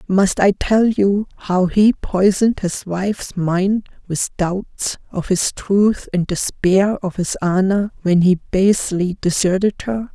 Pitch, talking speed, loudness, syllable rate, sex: 190 Hz, 150 wpm, -18 LUFS, 3.7 syllables/s, female